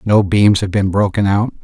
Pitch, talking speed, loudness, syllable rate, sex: 100 Hz, 220 wpm, -14 LUFS, 4.9 syllables/s, male